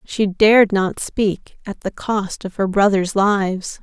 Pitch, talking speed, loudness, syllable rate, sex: 200 Hz, 170 wpm, -18 LUFS, 3.8 syllables/s, female